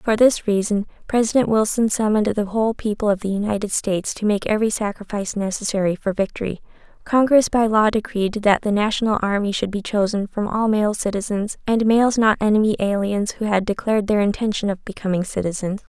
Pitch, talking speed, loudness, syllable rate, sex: 210 Hz, 180 wpm, -20 LUFS, 6.0 syllables/s, female